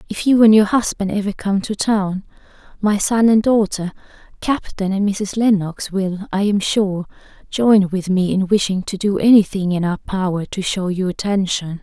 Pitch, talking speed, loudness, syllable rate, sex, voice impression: 200 Hz, 185 wpm, -17 LUFS, 4.6 syllables/s, female, very feminine, very adult-like, thin, slightly tensed, relaxed, very weak, dark, soft, slightly clear, fluent, very cute, intellectual, slightly refreshing, sincere, very calm, very friendly, very reassuring, very unique, elegant, slightly wild, very sweet, slightly lively, kind, very modest, light